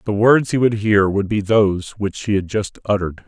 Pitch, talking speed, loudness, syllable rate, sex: 105 Hz, 240 wpm, -18 LUFS, 5.3 syllables/s, male